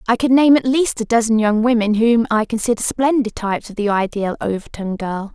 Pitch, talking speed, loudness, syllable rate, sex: 225 Hz, 215 wpm, -17 LUFS, 5.5 syllables/s, female